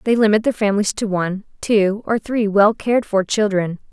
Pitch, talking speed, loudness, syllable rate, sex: 205 Hz, 200 wpm, -18 LUFS, 5.4 syllables/s, female